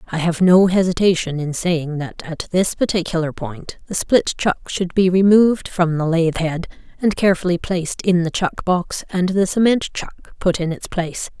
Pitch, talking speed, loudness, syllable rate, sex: 175 Hz, 190 wpm, -18 LUFS, 5.0 syllables/s, female